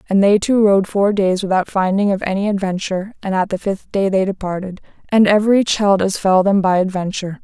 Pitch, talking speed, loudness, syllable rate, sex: 195 Hz, 210 wpm, -16 LUFS, 5.7 syllables/s, female